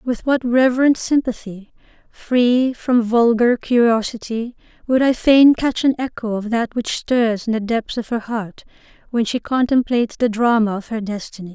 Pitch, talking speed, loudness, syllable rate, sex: 235 Hz, 165 wpm, -18 LUFS, 4.6 syllables/s, female